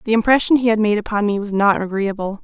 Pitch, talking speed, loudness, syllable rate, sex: 210 Hz, 245 wpm, -17 LUFS, 6.5 syllables/s, female